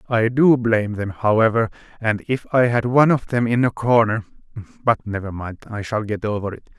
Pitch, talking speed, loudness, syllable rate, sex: 115 Hz, 195 wpm, -20 LUFS, 5.5 syllables/s, male